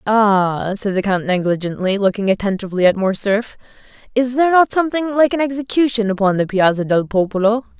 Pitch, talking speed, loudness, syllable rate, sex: 215 Hz, 160 wpm, -17 LUFS, 5.7 syllables/s, female